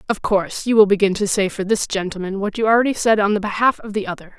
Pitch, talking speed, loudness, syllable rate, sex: 205 Hz, 275 wpm, -18 LUFS, 6.7 syllables/s, female